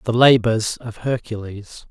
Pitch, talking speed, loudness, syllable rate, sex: 115 Hz, 125 wpm, -19 LUFS, 4.1 syllables/s, male